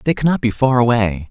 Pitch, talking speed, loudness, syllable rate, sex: 120 Hz, 230 wpm, -16 LUFS, 5.9 syllables/s, male